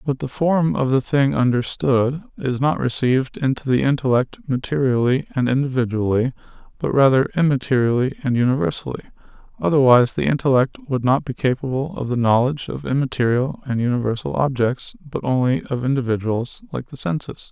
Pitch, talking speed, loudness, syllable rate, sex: 130 Hz, 145 wpm, -20 LUFS, 5.6 syllables/s, male